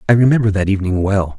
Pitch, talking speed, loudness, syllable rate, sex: 100 Hz, 215 wpm, -15 LUFS, 7.3 syllables/s, male